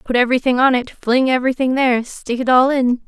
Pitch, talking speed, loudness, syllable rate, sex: 255 Hz, 215 wpm, -16 LUFS, 6.1 syllables/s, female